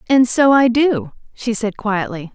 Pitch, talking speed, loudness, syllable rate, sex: 235 Hz, 180 wpm, -16 LUFS, 4.1 syllables/s, female